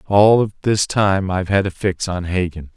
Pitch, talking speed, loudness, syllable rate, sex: 95 Hz, 215 wpm, -18 LUFS, 4.2 syllables/s, male